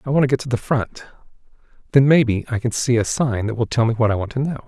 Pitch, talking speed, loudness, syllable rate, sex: 120 Hz, 295 wpm, -19 LUFS, 6.8 syllables/s, male